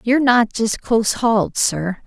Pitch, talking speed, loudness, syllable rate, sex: 230 Hz, 175 wpm, -17 LUFS, 4.6 syllables/s, female